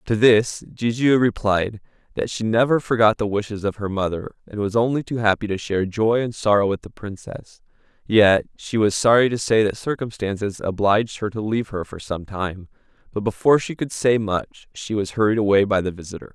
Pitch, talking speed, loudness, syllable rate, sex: 105 Hz, 200 wpm, -21 LUFS, 5.4 syllables/s, male